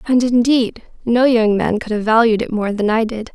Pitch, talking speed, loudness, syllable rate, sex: 225 Hz, 235 wpm, -16 LUFS, 4.9 syllables/s, female